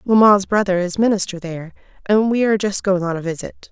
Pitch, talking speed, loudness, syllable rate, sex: 195 Hz, 210 wpm, -18 LUFS, 6.0 syllables/s, female